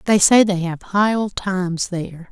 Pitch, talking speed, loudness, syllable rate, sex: 190 Hz, 210 wpm, -18 LUFS, 4.6 syllables/s, female